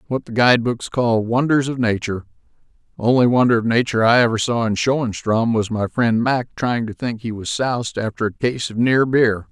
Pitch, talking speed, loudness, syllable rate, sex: 115 Hz, 210 wpm, -18 LUFS, 5.4 syllables/s, male